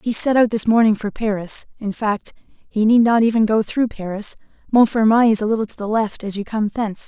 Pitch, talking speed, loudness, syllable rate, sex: 215 Hz, 230 wpm, -18 LUFS, 5.5 syllables/s, female